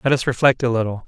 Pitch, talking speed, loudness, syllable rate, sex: 125 Hz, 280 wpm, -18 LUFS, 7.2 syllables/s, male